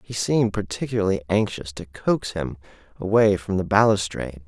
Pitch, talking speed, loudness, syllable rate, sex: 95 Hz, 150 wpm, -22 LUFS, 5.5 syllables/s, male